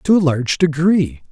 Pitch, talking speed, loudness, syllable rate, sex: 155 Hz, 185 wpm, -16 LUFS, 4.9 syllables/s, male